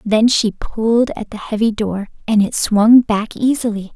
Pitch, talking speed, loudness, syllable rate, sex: 220 Hz, 180 wpm, -16 LUFS, 4.4 syllables/s, female